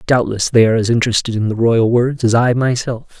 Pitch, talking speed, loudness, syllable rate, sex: 115 Hz, 225 wpm, -15 LUFS, 5.9 syllables/s, male